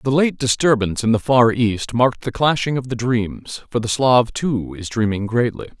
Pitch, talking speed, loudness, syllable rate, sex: 120 Hz, 205 wpm, -18 LUFS, 4.9 syllables/s, male